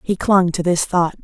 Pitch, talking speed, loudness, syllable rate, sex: 180 Hz, 245 wpm, -17 LUFS, 4.6 syllables/s, female